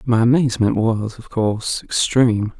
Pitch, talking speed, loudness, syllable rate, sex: 115 Hz, 140 wpm, -18 LUFS, 4.9 syllables/s, male